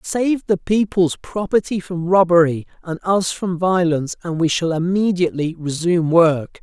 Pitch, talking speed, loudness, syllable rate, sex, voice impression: 175 Hz, 145 wpm, -18 LUFS, 4.7 syllables/s, male, masculine, adult-like, slightly fluent, refreshing, slightly unique